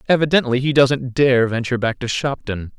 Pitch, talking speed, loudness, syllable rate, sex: 130 Hz, 170 wpm, -18 LUFS, 5.4 syllables/s, male